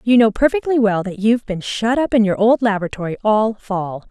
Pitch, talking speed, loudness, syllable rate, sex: 215 Hz, 220 wpm, -17 LUFS, 5.6 syllables/s, female